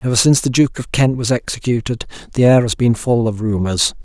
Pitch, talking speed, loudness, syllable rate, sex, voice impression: 120 Hz, 225 wpm, -16 LUFS, 5.8 syllables/s, male, middle-aged, slightly powerful, hard, slightly halting, raspy, cool, calm, mature, wild, slightly lively, strict, slightly intense